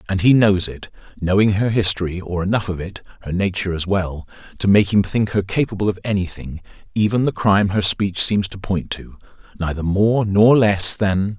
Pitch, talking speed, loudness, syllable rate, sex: 100 Hz, 185 wpm, -18 LUFS, 5.2 syllables/s, male